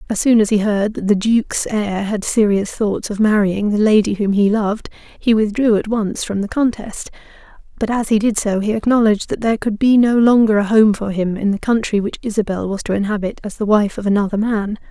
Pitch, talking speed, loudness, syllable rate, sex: 210 Hz, 230 wpm, -17 LUFS, 5.6 syllables/s, female